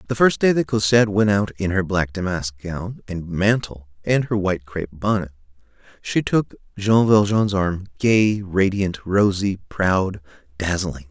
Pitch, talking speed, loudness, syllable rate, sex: 95 Hz, 155 wpm, -20 LUFS, 4.4 syllables/s, male